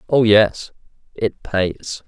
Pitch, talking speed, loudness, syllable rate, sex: 105 Hz, 115 wpm, -18 LUFS, 2.7 syllables/s, male